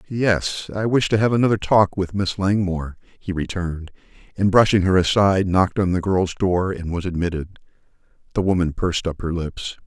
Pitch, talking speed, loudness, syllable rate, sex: 95 Hz, 185 wpm, -20 LUFS, 5.4 syllables/s, male